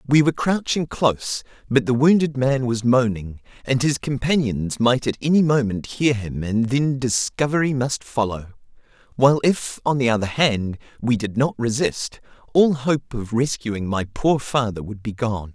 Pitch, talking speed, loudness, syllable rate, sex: 125 Hz, 170 wpm, -21 LUFS, 4.6 syllables/s, male